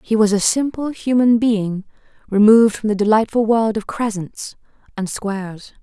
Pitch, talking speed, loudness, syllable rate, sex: 215 Hz, 155 wpm, -17 LUFS, 4.8 syllables/s, female